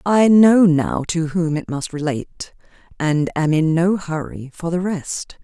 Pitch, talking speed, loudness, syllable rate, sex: 165 Hz, 175 wpm, -18 LUFS, 3.9 syllables/s, female